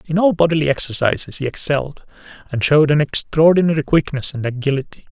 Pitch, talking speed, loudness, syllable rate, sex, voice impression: 150 Hz, 150 wpm, -17 LUFS, 6.4 syllables/s, male, masculine, middle-aged, slightly thin, weak, slightly soft, fluent, calm, reassuring, kind, modest